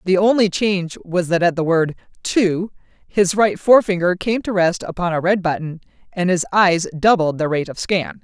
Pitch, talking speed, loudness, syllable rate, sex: 180 Hz, 195 wpm, -18 LUFS, 5.0 syllables/s, female